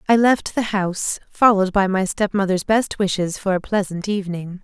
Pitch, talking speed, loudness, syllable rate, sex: 195 Hz, 180 wpm, -20 LUFS, 5.3 syllables/s, female